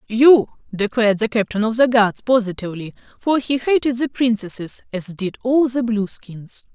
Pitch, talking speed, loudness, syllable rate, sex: 225 Hz, 160 wpm, -18 LUFS, 4.9 syllables/s, female